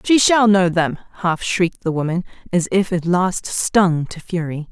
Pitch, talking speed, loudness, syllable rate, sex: 180 Hz, 190 wpm, -18 LUFS, 4.4 syllables/s, female